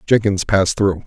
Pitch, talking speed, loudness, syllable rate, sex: 100 Hz, 170 wpm, -17 LUFS, 5.4 syllables/s, male